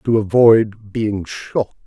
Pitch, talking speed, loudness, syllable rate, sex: 110 Hz, 130 wpm, -17 LUFS, 3.0 syllables/s, male